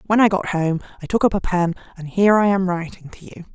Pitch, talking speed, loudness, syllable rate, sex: 185 Hz, 270 wpm, -19 LUFS, 6.2 syllables/s, female